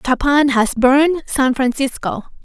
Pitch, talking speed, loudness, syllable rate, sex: 265 Hz, 125 wpm, -16 LUFS, 3.9 syllables/s, female